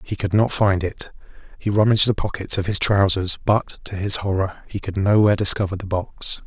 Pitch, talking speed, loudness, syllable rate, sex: 100 Hz, 205 wpm, -20 LUFS, 5.4 syllables/s, male